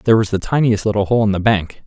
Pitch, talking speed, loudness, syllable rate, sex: 105 Hz, 290 wpm, -16 LUFS, 6.6 syllables/s, male